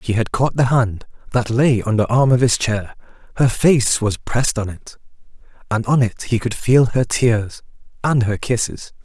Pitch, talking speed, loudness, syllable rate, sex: 115 Hz, 200 wpm, -18 LUFS, 4.5 syllables/s, male